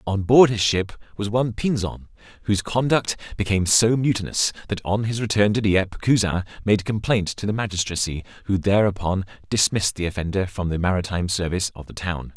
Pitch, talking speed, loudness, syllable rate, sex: 100 Hz, 175 wpm, -22 LUFS, 5.9 syllables/s, male